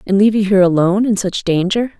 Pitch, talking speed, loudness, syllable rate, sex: 200 Hz, 210 wpm, -14 LUFS, 7.1 syllables/s, female